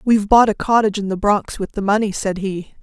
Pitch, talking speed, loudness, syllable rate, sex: 205 Hz, 255 wpm, -17 LUFS, 6.0 syllables/s, female